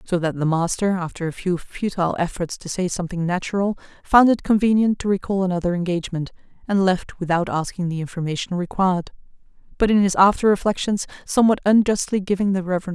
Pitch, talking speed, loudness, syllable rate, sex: 185 Hz, 170 wpm, -21 LUFS, 6.1 syllables/s, female